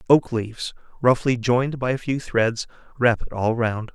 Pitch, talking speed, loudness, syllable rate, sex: 120 Hz, 180 wpm, -22 LUFS, 4.7 syllables/s, male